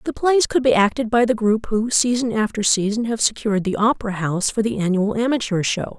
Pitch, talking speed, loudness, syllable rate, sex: 220 Hz, 220 wpm, -19 LUFS, 5.8 syllables/s, female